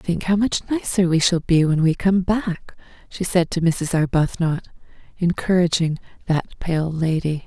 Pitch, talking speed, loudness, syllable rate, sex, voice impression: 170 Hz, 160 wpm, -20 LUFS, 4.4 syllables/s, female, very feminine, very adult-like, middle-aged, very thin, relaxed, slightly weak, slightly dark, very soft, very clear, fluent, very cute, very intellectual, refreshing, very sincere, very calm, very friendly, very reassuring, very unique, very elegant, very sweet, slightly lively, very kind, very modest